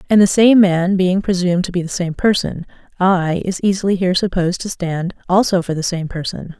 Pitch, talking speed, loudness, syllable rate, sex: 185 Hz, 210 wpm, -16 LUFS, 5.6 syllables/s, female